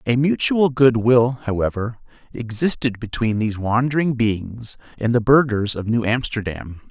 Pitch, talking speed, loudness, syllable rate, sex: 120 Hz, 140 wpm, -19 LUFS, 4.5 syllables/s, male